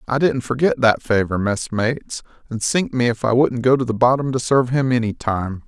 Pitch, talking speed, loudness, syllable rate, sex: 120 Hz, 220 wpm, -19 LUFS, 5.4 syllables/s, male